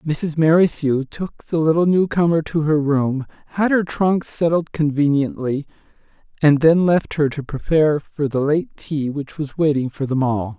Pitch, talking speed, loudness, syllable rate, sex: 150 Hz, 170 wpm, -19 LUFS, 4.4 syllables/s, male